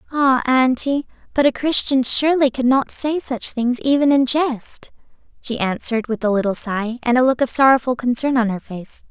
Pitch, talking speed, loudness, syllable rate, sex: 255 Hz, 190 wpm, -18 LUFS, 5.0 syllables/s, female